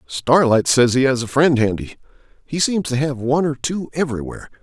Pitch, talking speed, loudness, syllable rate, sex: 135 Hz, 195 wpm, -18 LUFS, 5.7 syllables/s, male